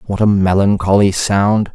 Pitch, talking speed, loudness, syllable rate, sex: 100 Hz, 140 wpm, -13 LUFS, 4.5 syllables/s, male